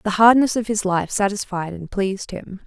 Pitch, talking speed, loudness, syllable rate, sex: 200 Hz, 205 wpm, -20 LUFS, 5.1 syllables/s, female